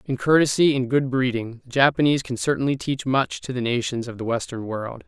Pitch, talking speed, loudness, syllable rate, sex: 130 Hz, 215 wpm, -22 LUFS, 5.7 syllables/s, male